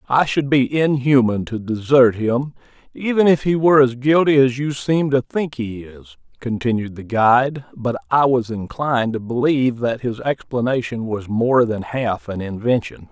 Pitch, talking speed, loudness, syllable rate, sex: 125 Hz, 175 wpm, -18 LUFS, 4.7 syllables/s, male